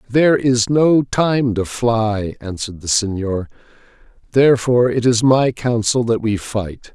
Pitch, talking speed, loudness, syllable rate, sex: 115 Hz, 145 wpm, -17 LUFS, 4.3 syllables/s, male